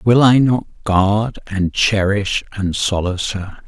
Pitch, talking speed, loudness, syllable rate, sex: 105 Hz, 145 wpm, -17 LUFS, 3.7 syllables/s, male